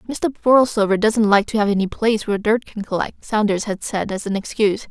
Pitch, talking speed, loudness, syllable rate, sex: 210 Hz, 220 wpm, -19 LUFS, 5.8 syllables/s, female